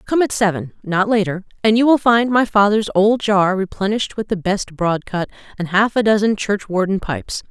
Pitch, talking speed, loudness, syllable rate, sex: 205 Hz, 190 wpm, -17 LUFS, 5.3 syllables/s, female